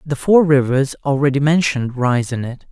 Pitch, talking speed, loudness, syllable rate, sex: 140 Hz, 175 wpm, -16 LUFS, 5.2 syllables/s, male